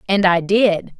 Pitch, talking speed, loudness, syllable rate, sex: 190 Hz, 180 wpm, -16 LUFS, 3.9 syllables/s, female